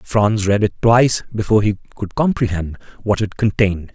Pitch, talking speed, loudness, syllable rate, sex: 105 Hz, 165 wpm, -17 LUFS, 5.6 syllables/s, male